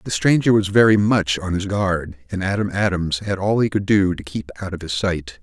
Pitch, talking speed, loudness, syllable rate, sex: 95 Hz, 245 wpm, -19 LUFS, 5.1 syllables/s, male